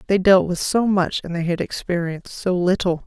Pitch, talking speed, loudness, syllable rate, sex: 180 Hz, 215 wpm, -20 LUFS, 5.3 syllables/s, female